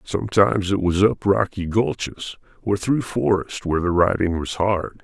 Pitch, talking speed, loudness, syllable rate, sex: 95 Hz, 165 wpm, -21 LUFS, 4.7 syllables/s, male